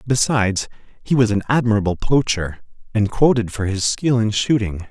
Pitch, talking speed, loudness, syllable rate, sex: 110 Hz, 160 wpm, -19 LUFS, 5.2 syllables/s, male